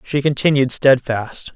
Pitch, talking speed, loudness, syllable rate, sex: 135 Hz, 115 wpm, -16 LUFS, 4.2 syllables/s, male